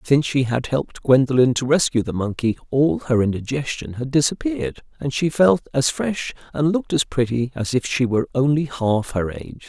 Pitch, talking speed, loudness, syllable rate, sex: 125 Hz, 190 wpm, -20 LUFS, 5.4 syllables/s, male